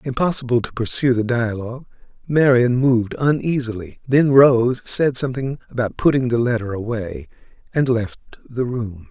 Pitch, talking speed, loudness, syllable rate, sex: 125 Hz, 140 wpm, -19 LUFS, 5.0 syllables/s, male